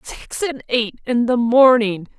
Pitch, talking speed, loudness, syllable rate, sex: 240 Hz, 165 wpm, -17 LUFS, 5.2 syllables/s, female